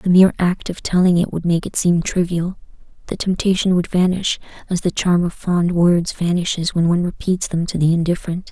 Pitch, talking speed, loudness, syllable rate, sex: 175 Hz, 205 wpm, -18 LUFS, 5.5 syllables/s, female